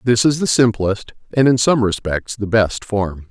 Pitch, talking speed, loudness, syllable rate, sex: 110 Hz, 200 wpm, -17 LUFS, 4.3 syllables/s, male